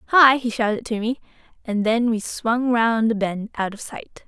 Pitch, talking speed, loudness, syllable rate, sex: 230 Hz, 210 wpm, -21 LUFS, 4.6 syllables/s, female